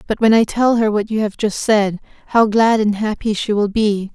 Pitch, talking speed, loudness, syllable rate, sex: 215 Hz, 245 wpm, -16 LUFS, 4.9 syllables/s, female